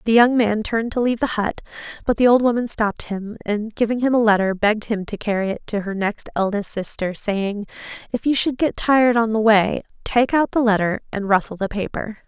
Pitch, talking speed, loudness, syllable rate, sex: 220 Hz, 225 wpm, -20 LUFS, 5.6 syllables/s, female